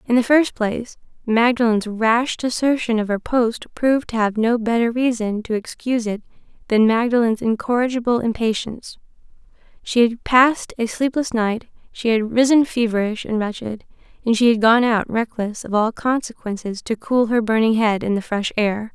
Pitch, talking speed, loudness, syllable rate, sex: 230 Hz, 170 wpm, -19 LUFS, 5.0 syllables/s, female